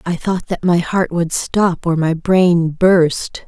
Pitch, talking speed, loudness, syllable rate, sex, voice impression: 175 Hz, 190 wpm, -16 LUFS, 3.3 syllables/s, female, feminine, very adult-like, slightly weak, soft, slightly muffled, calm, reassuring